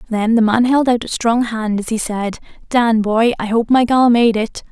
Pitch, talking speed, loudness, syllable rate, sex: 230 Hz, 240 wpm, -15 LUFS, 4.6 syllables/s, female